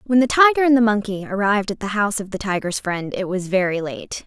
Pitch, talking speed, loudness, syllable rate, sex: 210 Hz, 255 wpm, -19 LUFS, 6.0 syllables/s, female